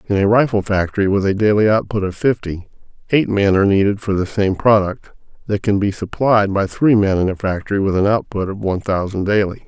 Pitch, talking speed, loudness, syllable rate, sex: 100 Hz, 215 wpm, -17 LUFS, 5.9 syllables/s, male